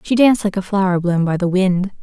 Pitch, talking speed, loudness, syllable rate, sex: 190 Hz, 265 wpm, -16 LUFS, 5.9 syllables/s, female